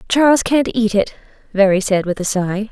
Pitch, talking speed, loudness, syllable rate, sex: 215 Hz, 200 wpm, -16 LUFS, 5.0 syllables/s, female